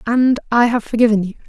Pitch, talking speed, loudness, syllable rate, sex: 230 Hz, 205 wpm, -16 LUFS, 6.2 syllables/s, female